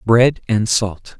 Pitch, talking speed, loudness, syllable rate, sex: 110 Hz, 150 wpm, -17 LUFS, 3.0 syllables/s, male